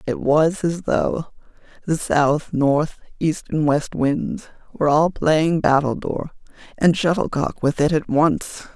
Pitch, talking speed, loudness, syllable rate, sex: 155 Hz, 145 wpm, -20 LUFS, 4.0 syllables/s, female